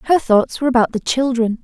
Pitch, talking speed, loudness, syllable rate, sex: 245 Hz, 220 wpm, -16 LUFS, 5.7 syllables/s, female